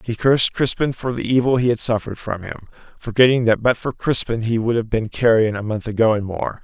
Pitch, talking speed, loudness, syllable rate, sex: 115 Hz, 235 wpm, -19 LUFS, 5.9 syllables/s, male